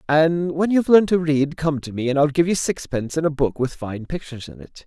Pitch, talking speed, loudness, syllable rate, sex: 155 Hz, 285 wpm, -20 LUFS, 6.0 syllables/s, male